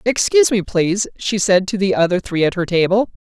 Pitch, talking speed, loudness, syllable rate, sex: 195 Hz, 220 wpm, -17 LUFS, 5.8 syllables/s, female